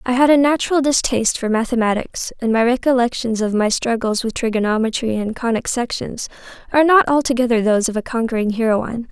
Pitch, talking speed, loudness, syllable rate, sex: 240 Hz, 170 wpm, -18 LUFS, 6.1 syllables/s, female